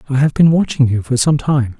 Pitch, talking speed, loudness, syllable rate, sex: 135 Hz, 265 wpm, -14 LUFS, 5.7 syllables/s, male